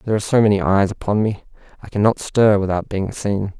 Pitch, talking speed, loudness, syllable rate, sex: 105 Hz, 215 wpm, -18 LUFS, 6.0 syllables/s, male